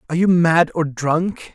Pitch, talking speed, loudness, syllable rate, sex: 165 Hz, 195 wpm, -18 LUFS, 4.4 syllables/s, male